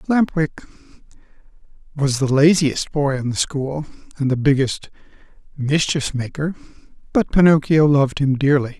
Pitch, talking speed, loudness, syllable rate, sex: 145 Hz, 130 wpm, -18 LUFS, 4.7 syllables/s, male